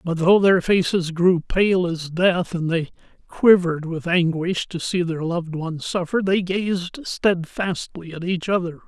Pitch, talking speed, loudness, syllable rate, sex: 175 Hz, 170 wpm, -21 LUFS, 4.2 syllables/s, male